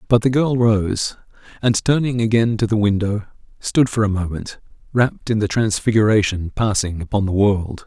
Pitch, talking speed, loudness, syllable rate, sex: 110 Hz, 170 wpm, -19 LUFS, 4.9 syllables/s, male